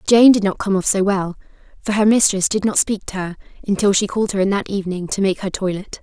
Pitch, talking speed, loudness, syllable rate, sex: 195 Hz, 260 wpm, -18 LUFS, 6.2 syllables/s, female